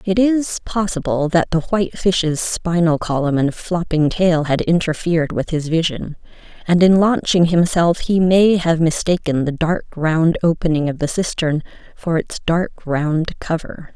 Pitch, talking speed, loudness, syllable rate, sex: 170 Hz, 160 wpm, -17 LUFS, 4.3 syllables/s, female